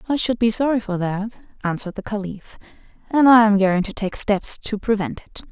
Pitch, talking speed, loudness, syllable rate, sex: 215 Hz, 205 wpm, -20 LUFS, 5.4 syllables/s, female